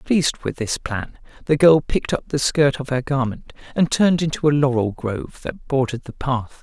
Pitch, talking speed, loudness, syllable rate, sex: 140 Hz, 210 wpm, -20 LUFS, 5.4 syllables/s, male